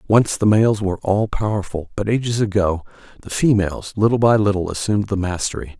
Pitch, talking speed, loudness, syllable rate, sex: 100 Hz, 175 wpm, -19 LUFS, 5.9 syllables/s, male